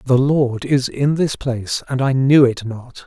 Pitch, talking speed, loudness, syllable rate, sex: 130 Hz, 215 wpm, -17 LUFS, 4.2 syllables/s, male